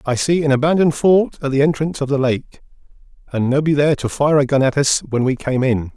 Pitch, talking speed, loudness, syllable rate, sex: 140 Hz, 240 wpm, -17 LUFS, 6.2 syllables/s, male